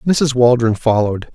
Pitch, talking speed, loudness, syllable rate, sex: 125 Hz, 135 wpm, -15 LUFS, 5.2 syllables/s, male